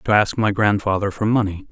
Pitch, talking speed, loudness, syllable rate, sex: 105 Hz, 210 wpm, -19 LUFS, 5.7 syllables/s, male